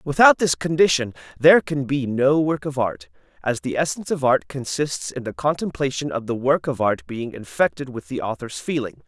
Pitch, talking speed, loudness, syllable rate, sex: 135 Hz, 200 wpm, -21 LUFS, 5.3 syllables/s, male